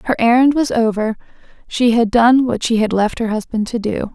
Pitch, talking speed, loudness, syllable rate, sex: 230 Hz, 215 wpm, -16 LUFS, 5.2 syllables/s, female